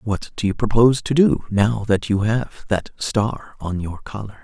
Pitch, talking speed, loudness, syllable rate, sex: 110 Hz, 205 wpm, -20 LUFS, 4.4 syllables/s, male